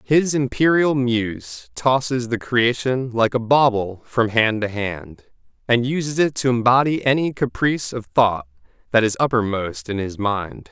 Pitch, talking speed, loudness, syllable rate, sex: 120 Hz, 160 wpm, -20 LUFS, 4.2 syllables/s, male